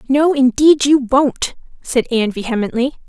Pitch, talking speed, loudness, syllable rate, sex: 260 Hz, 135 wpm, -15 LUFS, 4.8 syllables/s, female